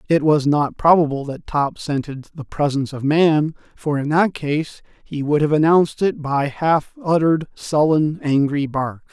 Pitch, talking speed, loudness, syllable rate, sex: 150 Hz, 170 wpm, -19 LUFS, 4.5 syllables/s, male